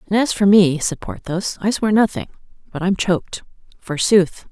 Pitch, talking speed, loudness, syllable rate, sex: 190 Hz, 175 wpm, -18 LUFS, 4.8 syllables/s, female